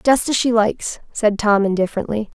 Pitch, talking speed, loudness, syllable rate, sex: 220 Hz, 175 wpm, -18 LUFS, 5.5 syllables/s, female